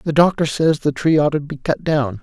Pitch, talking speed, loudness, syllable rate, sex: 150 Hz, 270 wpm, -18 LUFS, 5.0 syllables/s, male